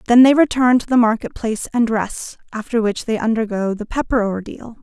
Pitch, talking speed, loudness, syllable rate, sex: 230 Hz, 200 wpm, -18 LUFS, 5.4 syllables/s, female